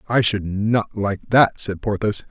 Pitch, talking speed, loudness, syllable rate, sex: 105 Hz, 180 wpm, -20 LUFS, 4.1 syllables/s, male